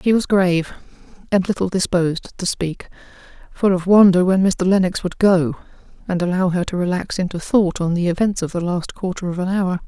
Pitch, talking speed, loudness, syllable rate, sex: 185 Hz, 200 wpm, -18 LUFS, 5.5 syllables/s, female